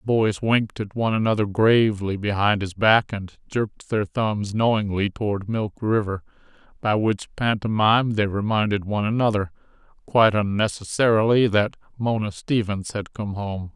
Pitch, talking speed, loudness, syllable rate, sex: 105 Hz, 140 wpm, -22 LUFS, 5.1 syllables/s, male